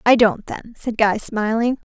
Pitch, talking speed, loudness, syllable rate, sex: 225 Hz, 190 wpm, -19 LUFS, 4.2 syllables/s, female